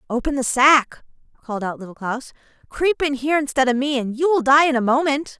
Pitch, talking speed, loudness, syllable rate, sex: 270 Hz, 225 wpm, -19 LUFS, 5.9 syllables/s, female